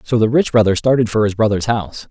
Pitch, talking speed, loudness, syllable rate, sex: 110 Hz, 255 wpm, -15 LUFS, 6.5 syllables/s, male